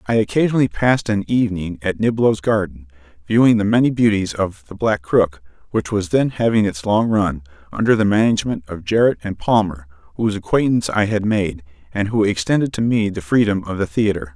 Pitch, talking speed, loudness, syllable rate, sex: 100 Hz, 190 wpm, -18 LUFS, 5.8 syllables/s, male